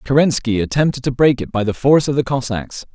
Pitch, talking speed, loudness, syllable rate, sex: 125 Hz, 225 wpm, -17 LUFS, 6.1 syllables/s, male